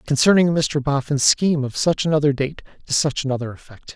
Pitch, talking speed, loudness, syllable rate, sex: 145 Hz, 180 wpm, -19 LUFS, 5.8 syllables/s, male